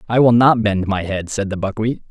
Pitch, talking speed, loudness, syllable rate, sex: 105 Hz, 255 wpm, -17 LUFS, 5.3 syllables/s, male